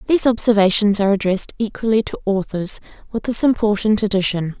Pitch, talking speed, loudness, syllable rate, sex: 210 Hz, 145 wpm, -18 LUFS, 6.2 syllables/s, female